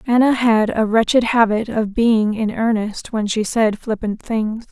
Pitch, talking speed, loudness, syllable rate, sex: 220 Hz, 180 wpm, -18 LUFS, 4.2 syllables/s, female